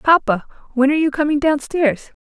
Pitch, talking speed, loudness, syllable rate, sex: 280 Hz, 190 wpm, -17 LUFS, 5.4 syllables/s, female